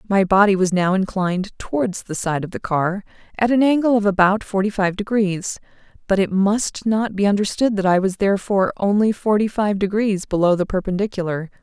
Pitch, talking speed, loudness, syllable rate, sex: 200 Hz, 185 wpm, -19 LUFS, 5.5 syllables/s, female